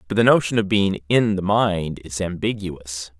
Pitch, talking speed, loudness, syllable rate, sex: 95 Hz, 190 wpm, -21 LUFS, 4.5 syllables/s, male